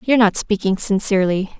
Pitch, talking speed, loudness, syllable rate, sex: 200 Hz, 150 wpm, -17 LUFS, 6.0 syllables/s, female